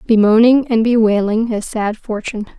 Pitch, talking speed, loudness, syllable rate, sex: 225 Hz, 140 wpm, -15 LUFS, 5.1 syllables/s, female